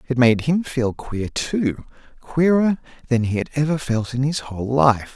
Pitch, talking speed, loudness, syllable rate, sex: 135 Hz, 175 wpm, -21 LUFS, 4.5 syllables/s, male